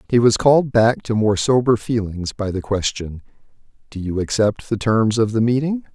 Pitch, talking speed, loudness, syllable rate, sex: 115 Hz, 180 wpm, -18 LUFS, 5.0 syllables/s, male